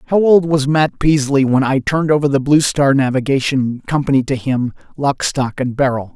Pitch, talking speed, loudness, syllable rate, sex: 140 Hz, 195 wpm, -15 LUFS, 5.1 syllables/s, male